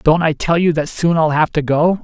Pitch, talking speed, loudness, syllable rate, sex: 160 Hz, 295 wpm, -15 LUFS, 5.2 syllables/s, male